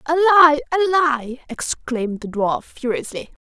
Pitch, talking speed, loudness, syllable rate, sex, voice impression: 285 Hz, 120 wpm, -18 LUFS, 4.1 syllables/s, female, very feminine, slightly young, slightly adult-like, thin, very tensed, very powerful, bright, very hard, very clear, very fluent, slightly raspy, cute, intellectual, very refreshing, sincere, slightly calm, slightly friendly, slightly reassuring, very unique, slightly elegant, very wild, slightly sweet, very lively, very strict, very intense, very sharp